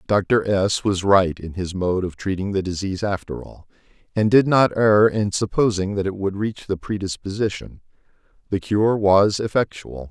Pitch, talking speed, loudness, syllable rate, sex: 100 Hz, 170 wpm, -20 LUFS, 4.7 syllables/s, male